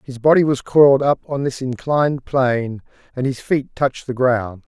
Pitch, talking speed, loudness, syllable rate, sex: 130 Hz, 190 wpm, -18 LUFS, 5.1 syllables/s, male